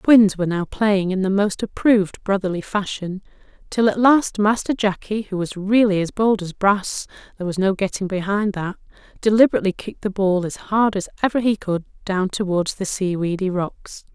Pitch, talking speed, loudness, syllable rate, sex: 200 Hz, 185 wpm, -20 LUFS, 5.3 syllables/s, female